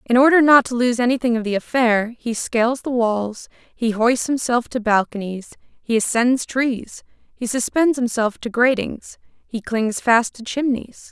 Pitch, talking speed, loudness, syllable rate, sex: 240 Hz, 165 wpm, -19 LUFS, 4.3 syllables/s, female